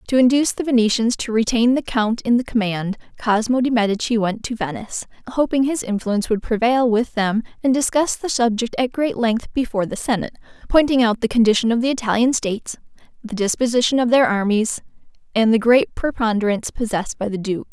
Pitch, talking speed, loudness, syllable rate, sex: 230 Hz, 185 wpm, -19 LUFS, 6.0 syllables/s, female